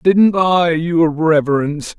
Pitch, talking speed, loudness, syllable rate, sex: 165 Hz, 120 wpm, -14 LUFS, 3.6 syllables/s, male